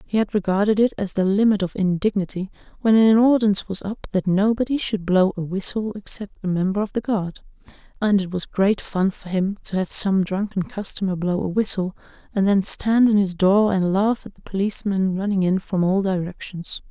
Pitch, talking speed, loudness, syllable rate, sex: 195 Hz, 200 wpm, -21 LUFS, 5.3 syllables/s, female